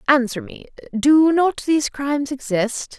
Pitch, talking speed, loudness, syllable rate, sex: 280 Hz, 140 wpm, -19 LUFS, 4.4 syllables/s, female